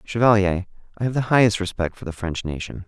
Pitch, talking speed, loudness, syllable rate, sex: 100 Hz, 210 wpm, -22 LUFS, 6.1 syllables/s, male